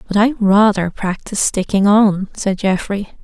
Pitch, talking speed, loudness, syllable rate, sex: 200 Hz, 150 wpm, -15 LUFS, 4.3 syllables/s, female